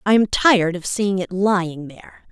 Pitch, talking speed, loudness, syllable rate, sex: 190 Hz, 210 wpm, -18 LUFS, 5.2 syllables/s, female